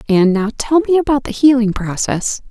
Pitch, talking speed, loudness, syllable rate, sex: 235 Hz, 190 wpm, -15 LUFS, 4.9 syllables/s, female